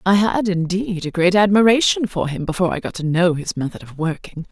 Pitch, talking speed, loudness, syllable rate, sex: 185 Hz, 225 wpm, -18 LUFS, 5.7 syllables/s, female